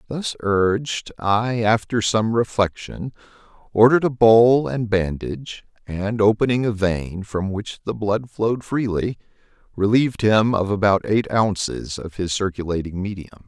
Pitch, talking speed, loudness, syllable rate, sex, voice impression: 105 Hz, 140 wpm, -20 LUFS, 4.4 syllables/s, male, masculine, adult-like, thick, tensed, powerful, slightly hard, slightly muffled, raspy, cool, intellectual, calm, mature, reassuring, wild, lively, kind